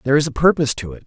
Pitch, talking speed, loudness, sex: 140 Hz, 340 wpm, -18 LUFS, male